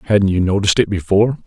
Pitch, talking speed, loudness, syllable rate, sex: 100 Hz, 205 wpm, -15 LUFS, 7.5 syllables/s, male